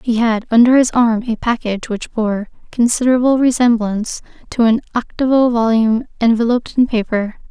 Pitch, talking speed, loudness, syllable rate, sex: 230 Hz, 145 wpm, -15 LUFS, 5.5 syllables/s, female